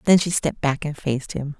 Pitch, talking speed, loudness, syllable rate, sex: 150 Hz, 265 wpm, -22 LUFS, 6.2 syllables/s, female